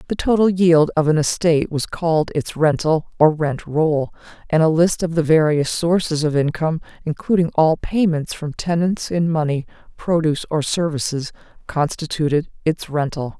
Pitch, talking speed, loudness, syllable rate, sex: 160 Hz, 155 wpm, -19 LUFS, 4.9 syllables/s, female